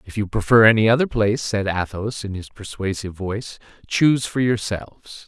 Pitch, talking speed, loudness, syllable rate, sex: 110 Hz, 170 wpm, -20 LUFS, 5.5 syllables/s, male